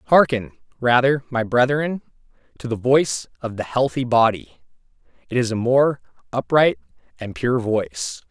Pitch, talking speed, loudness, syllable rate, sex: 120 Hz, 135 wpm, -20 LUFS, 4.5 syllables/s, male